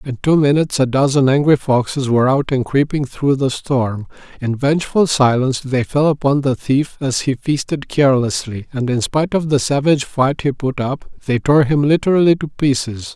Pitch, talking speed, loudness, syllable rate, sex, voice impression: 135 Hz, 190 wpm, -16 LUFS, 5.2 syllables/s, male, masculine, adult-like, slightly soft, slightly calm, friendly, reassuring